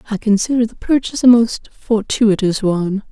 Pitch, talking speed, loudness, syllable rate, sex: 220 Hz, 155 wpm, -15 LUFS, 5.4 syllables/s, female